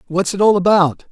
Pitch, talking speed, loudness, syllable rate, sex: 180 Hz, 215 wpm, -14 LUFS, 5.5 syllables/s, male